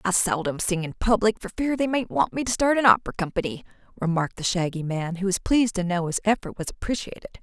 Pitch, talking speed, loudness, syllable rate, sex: 200 Hz, 235 wpm, -24 LUFS, 6.4 syllables/s, female